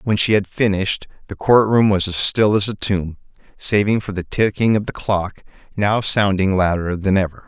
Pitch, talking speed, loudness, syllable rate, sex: 100 Hz, 195 wpm, -18 LUFS, 4.8 syllables/s, male